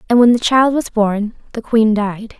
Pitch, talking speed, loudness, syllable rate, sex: 225 Hz, 225 wpm, -15 LUFS, 4.5 syllables/s, female